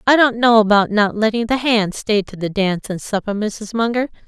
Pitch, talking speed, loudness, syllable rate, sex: 215 Hz, 225 wpm, -17 LUFS, 5.3 syllables/s, female